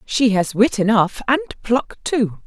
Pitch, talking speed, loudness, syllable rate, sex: 225 Hz, 145 wpm, -18 LUFS, 4.0 syllables/s, female